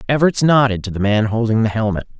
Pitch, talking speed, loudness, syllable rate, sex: 115 Hz, 220 wpm, -16 LUFS, 6.2 syllables/s, male